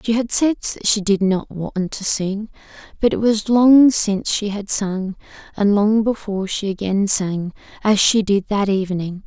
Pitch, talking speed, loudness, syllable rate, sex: 205 Hz, 180 wpm, -18 LUFS, 4.4 syllables/s, female